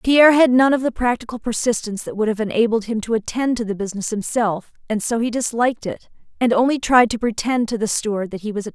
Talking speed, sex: 255 wpm, female